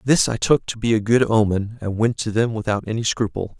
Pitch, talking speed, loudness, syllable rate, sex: 110 Hz, 250 wpm, -20 LUFS, 5.5 syllables/s, male